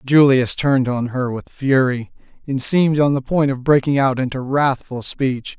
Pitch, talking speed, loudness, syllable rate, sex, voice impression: 135 Hz, 185 wpm, -18 LUFS, 4.7 syllables/s, male, very masculine, very adult-like, middle-aged, very thick, tensed, powerful, bright, hard, very clear, fluent, cool, intellectual, refreshing, sincere, calm, very friendly, very reassuring, slightly unique, elegant, slightly wild, sweet, slightly lively, very kind, very modest